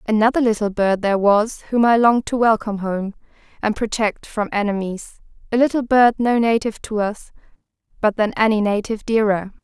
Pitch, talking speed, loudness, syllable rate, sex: 215 Hz, 170 wpm, -19 LUFS, 5.7 syllables/s, female